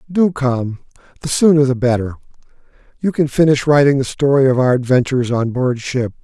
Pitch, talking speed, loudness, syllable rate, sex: 135 Hz, 175 wpm, -15 LUFS, 5.5 syllables/s, male